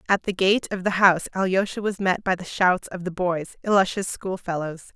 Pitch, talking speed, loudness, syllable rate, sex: 185 Hz, 205 wpm, -23 LUFS, 5.4 syllables/s, female